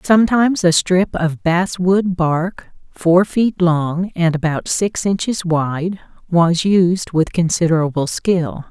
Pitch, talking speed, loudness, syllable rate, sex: 175 Hz, 140 wpm, -16 LUFS, 3.6 syllables/s, female